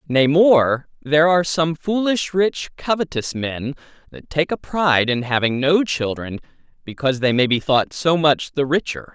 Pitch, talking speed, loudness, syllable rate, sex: 150 Hz, 170 wpm, -19 LUFS, 4.7 syllables/s, male